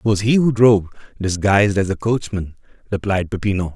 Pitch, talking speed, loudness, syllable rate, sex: 100 Hz, 175 wpm, -18 LUFS, 5.9 syllables/s, male